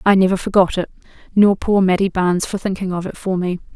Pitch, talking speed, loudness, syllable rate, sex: 190 Hz, 225 wpm, -17 LUFS, 6.2 syllables/s, female